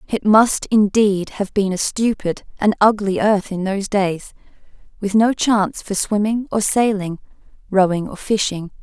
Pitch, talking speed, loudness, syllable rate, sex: 200 Hz, 155 wpm, -18 LUFS, 4.5 syllables/s, female